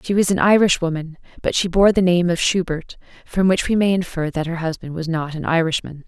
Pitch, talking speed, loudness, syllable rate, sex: 175 Hz, 225 wpm, -19 LUFS, 5.7 syllables/s, female